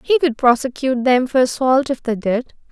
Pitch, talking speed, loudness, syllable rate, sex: 255 Hz, 200 wpm, -17 LUFS, 5.2 syllables/s, female